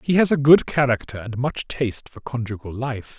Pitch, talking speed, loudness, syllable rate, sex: 125 Hz, 205 wpm, -21 LUFS, 5.2 syllables/s, male